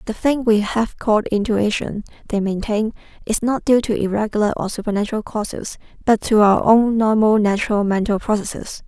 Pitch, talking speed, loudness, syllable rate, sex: 215 Hz, 160 wpm, -18 LUFS, 5.4 syllables/s, female